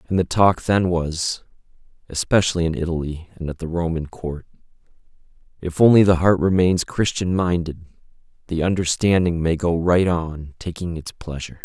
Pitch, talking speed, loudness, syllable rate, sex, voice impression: 85 Hz, 150 wpm, -20 LUFS, 5.0 syllables/s, male, masculine, adult-like, thick, tensed, powerful, slightly soft, slightly muffled, cool, intellectual, calm, friendly, wild, kind, modest